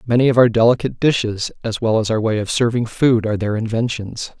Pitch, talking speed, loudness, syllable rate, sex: 115 Hz, 220 wpm, -18 LUFS, 6.0 syllables/s, male